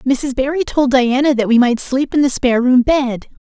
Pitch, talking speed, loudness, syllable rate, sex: 260 Hz, 225 wpm, -15 LUFS, 4.9 syllables/s, female